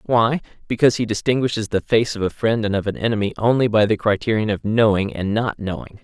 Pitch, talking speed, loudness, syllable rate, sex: 110 Hz, 220 wpm, -20 LUFS, 6.1 syllables/s, male